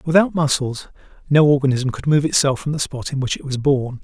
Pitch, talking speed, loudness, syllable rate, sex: 140 Hz, 225 wpm, -18 LUFS, 5.7 syllables/s, male